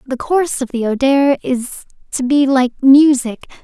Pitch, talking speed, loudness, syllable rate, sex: 265 Hz, 165 wpm, -14 LUFS, 4.3 syllables/s, female